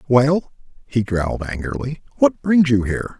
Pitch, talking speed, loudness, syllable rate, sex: 130 Hz, 150 wpm, -19 LUFS, 4.8 syllables/s, male